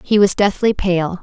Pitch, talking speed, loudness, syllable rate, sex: 195 Hz, 195 wpm, -16 LUFS, 4.4 syllables/s, female